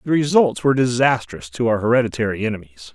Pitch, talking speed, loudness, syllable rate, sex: 120 Hz, 165 wpm, -18 LUFS, 6.4 syllables/s, male